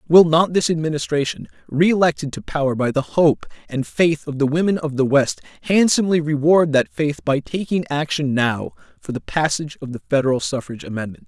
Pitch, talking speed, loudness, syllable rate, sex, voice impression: 150 Hz, 180 wpm, -19 LUFS, 5.6 syllables/s, male, very masculine, middle-aged, very thick, very tensed, very powerful, bright, hard, very clear, very fluent, slightly raspy, very cool, very intellectual, refreshing, sincere, slightly calm, mature, very friendly, very reassuring, very unique, slightly elegant, wild, slightly sweet, very lively, kind, intense